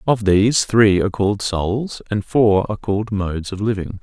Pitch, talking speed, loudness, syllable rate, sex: 105 Hz, 195 wpm, -18 LUFS, 5.3 syllables/s, male